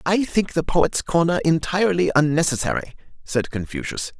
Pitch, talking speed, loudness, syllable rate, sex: 155 Hz, 130 wpm, -21 LUFS, 5.2 syllables/s, male